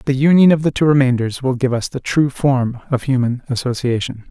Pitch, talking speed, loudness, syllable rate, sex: 130 Hz, 210 wpm, -16 LUFS, 5.5 syllables/s, male